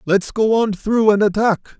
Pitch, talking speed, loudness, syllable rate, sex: 210 Hz, 200 wpm, -17 LUFS, 4.5 syllables/s, male